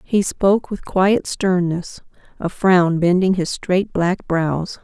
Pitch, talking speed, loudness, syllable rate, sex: 180 Hz, 150 wpm, -18 LUFS, 3.4 syllables/s, female